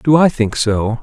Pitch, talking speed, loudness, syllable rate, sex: 125 Hz, 235 wpm, -15 LUFS, 4.0 syllables/s, male